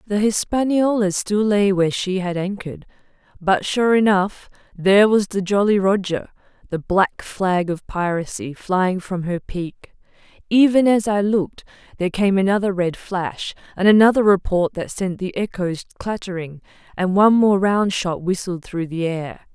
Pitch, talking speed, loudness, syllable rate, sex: 190 Hz, 150 wpm, -19 LUFS, 4.6 syllables/s, female